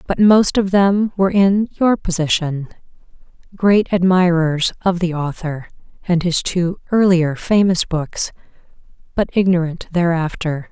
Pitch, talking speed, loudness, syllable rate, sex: 180 Hz, 120 wpm, -17 LUFS, 4.1 syllables/s, female